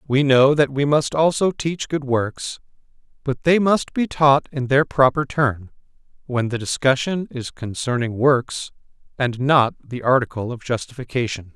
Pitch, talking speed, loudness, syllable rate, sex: 135 Hz, 155 wpm, -20 LUFS, 4.4 syllables/s, male